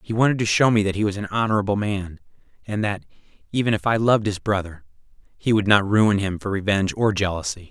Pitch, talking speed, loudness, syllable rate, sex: 100 Hz, 220 wpm, -21 LUFS, 6.4 syllables/s, male